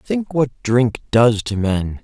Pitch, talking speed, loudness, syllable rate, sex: 120 Hz, 175 wpm, -18 LUFS, 3.4 syllables/s, male